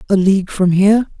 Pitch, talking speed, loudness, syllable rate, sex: 195 Hz, 200 wpm, -14 LUFS, 6.7 syllables/s, male